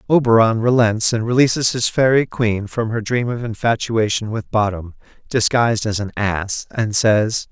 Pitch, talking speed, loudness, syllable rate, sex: 115 Hz, 160 wpm, -18 LUFS, 4.6 syllables/s, male